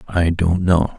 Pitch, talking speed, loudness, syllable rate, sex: 85 Hz, 185 wpm, -18 LUFS, 3.6 syllables/s, male